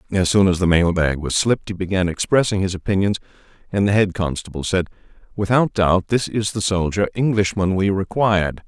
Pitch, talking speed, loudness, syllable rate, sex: 95 Hz, 180 wpm, -19 LUFS, 5.6 syllables/s, male